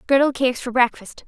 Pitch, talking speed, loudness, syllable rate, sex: 255 Hz, 190 wpm, -19 LUFS, 5.8 syllables/s, female